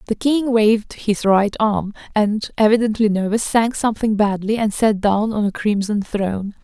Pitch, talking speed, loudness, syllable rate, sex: 215 Hz, 170 wpm, -18 LUFS, 4.8 syllables/s, female